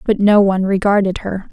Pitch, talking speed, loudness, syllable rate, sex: 200 Hz, 195 wpm, -15 LUFS, 5.8 syllables/s, female